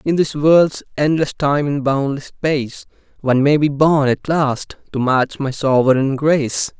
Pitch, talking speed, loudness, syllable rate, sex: 140 Hz, 170 wpm, -17 LUFS, 4.3 syllables/s, male